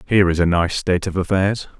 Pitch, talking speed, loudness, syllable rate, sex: 90 Hz, 235 wpm, -18 LUFS, 6.4 syllables/s, male